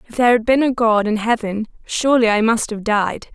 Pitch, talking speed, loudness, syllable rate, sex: 225 Hz, 235 wpm, -17 LUFS, 5.8 syllables/s, female